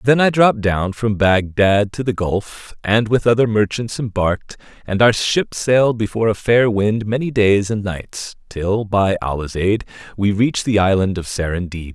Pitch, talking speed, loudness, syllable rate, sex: 105 Hz, 180 wpm, -17 LUFS, 4.6 syllables/s, male